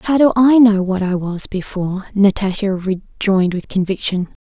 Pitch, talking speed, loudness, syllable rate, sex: 200 Hz, 160 wpm, -16 LUFS, 4.9 syllables/s, female